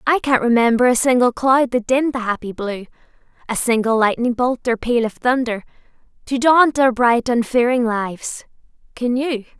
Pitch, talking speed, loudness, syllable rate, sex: 245 Hz, 170 wpm, -17 LUFS, 5.0 syllables/s, female